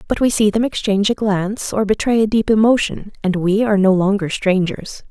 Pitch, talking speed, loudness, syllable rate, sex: 205 Hz, 210 wpm, -17 LUFS, 5.6 syllables/s, female